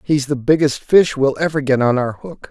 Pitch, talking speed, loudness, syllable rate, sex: 140 Hz, 240 wpm, -16 LUFS, 5.0 syllables/s, male